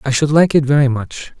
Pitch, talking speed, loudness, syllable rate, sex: 140 Hz, 255 wpm, -14 LUFS, 5.6 syllables/s, male